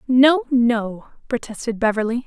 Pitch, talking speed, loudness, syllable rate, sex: 235 Hz, 105 wpm, -19 LUFS, 4.3 syllables/s, female